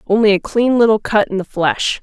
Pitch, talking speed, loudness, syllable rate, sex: 210 Hz, 235 wpm, -15 LUFS, 5.3 syllables/s, female